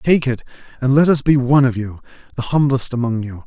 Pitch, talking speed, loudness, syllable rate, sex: 130 Hz, 225 wpm, -17 LUFS, 6.0 syllables/s, male